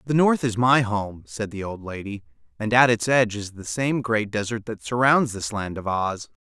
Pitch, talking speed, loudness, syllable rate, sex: 110 Hz, 225 wpm, -23 LUFS, 4.8 syllables/s, male